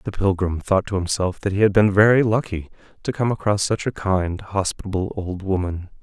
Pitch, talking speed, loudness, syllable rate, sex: 100 Hz, 200 wpm, -21 LUFS, 5.3 syllables/s, male